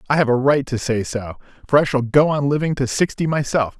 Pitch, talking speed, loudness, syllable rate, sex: 135 Hz, 255 wpm, -19 LUFS, 5.8 syllables/s, male